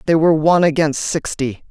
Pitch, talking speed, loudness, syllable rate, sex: 160 Hz, 175 wpm, -16 LUFS, 6.0 syllables/s, female